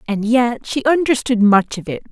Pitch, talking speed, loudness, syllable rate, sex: 235 Hz, 200 wpm, -16 LUFS, 4.8 syllables/s, female